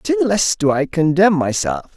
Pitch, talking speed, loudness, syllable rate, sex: 170 Hz, 185 wpm, -16 LUFS, 4.4 syllables/s, male